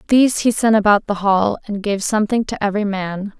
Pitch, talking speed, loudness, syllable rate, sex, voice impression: 205 Hz, 210 wpm, -17 LUFS, 5.9 syllables/s, female, feminine, slightly young, tensed, slightly weak, bright, soft, slightly raspy, slightly cute, calm, friendly, reassuring, elegant, kind, modest